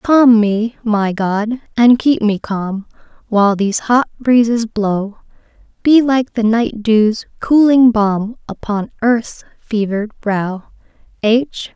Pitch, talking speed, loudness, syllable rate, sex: 225 Hz, 130 wpm, -15 LUFS, 3.5 syllables/s, female